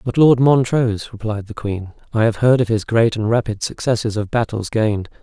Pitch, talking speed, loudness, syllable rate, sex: 115 Hz, 205 wpm, -18 LUFS, 5.4 syllables/s, male